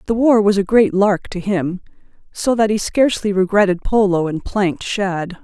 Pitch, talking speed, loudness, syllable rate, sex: 200 Hz, 190 wpm, -17 LUFS, 5.0 syllables/s, female